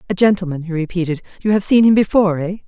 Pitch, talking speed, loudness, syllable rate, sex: 185 Hz, 200 wpm, -16 LUFS, 7.2 syllables/s, female